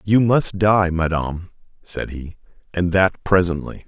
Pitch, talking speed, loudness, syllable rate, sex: 90 Hz, 140 wpm, -19 LUFS, 3.9 syllables/s, male